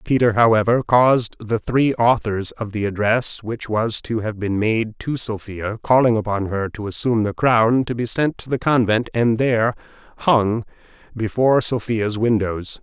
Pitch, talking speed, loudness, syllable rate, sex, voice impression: 115 Hz, 170 wpm, -19 LUFS, 4.6 syllables/s, male, masculine, middle-aged, tensed, powerful, slightly hard, clear, slightly halting, calm, mature, wild, slightly lively, slightly strict